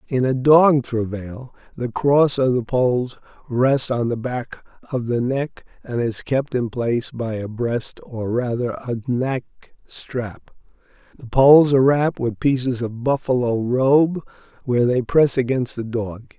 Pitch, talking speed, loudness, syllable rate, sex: 125 Hz, 160 wpm, -20 LUFS, 4.1 syllables/s, male